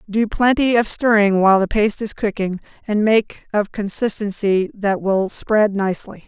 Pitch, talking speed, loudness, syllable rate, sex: 205 Hz, 165 wpm, -18 LUFS, 4.7 syllables/s, female